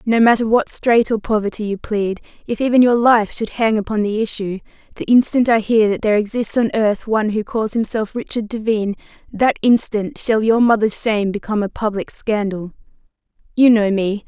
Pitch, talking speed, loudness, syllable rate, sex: 215 Hz, 180 wpm, -17 LUFS, 5.4 syllables/s, female